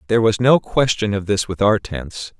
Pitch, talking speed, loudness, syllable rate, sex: 105 Hz, 225 wpm, -18 LUFS, 5.1 syllables/s, male